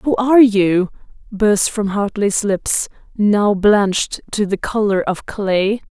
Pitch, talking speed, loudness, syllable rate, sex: 205 Hz, 140 wpm, -16 LUFS, 3.6 syllables/s, female